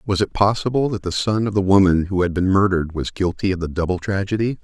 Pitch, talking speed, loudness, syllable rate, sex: 95 Hz, 245 wpm, -19 LUFS, 6.2 syllables/s, male